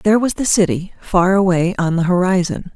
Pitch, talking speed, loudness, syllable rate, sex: 185 Hz, 195 wpm, -16 LUFS, 5.4 syllables/s, female